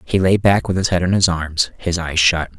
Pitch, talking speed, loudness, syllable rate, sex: 85 Hz, 280 wpm, -17 LUFS, 5.0 syllables/s, male